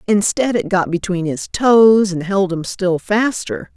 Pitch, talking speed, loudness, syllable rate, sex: 195 Hz, 175 wpm, -16 LUFS, 3.9 syllables/s, female